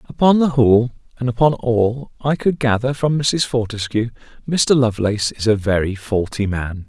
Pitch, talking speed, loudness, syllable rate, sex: 120 Hz, 165 wpm, -18 LUFS, 4.9 syllables/s, male